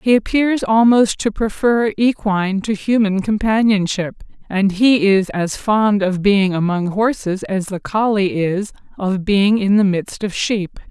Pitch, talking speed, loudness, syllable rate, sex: 205 Hz, 160 wpm, -17 LUFS, 4.0 syllables/s, female